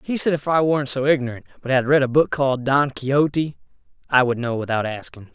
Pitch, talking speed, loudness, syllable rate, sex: 135 Hz, 225 wpm, -20 LUFS, 5.9 syllables/s, male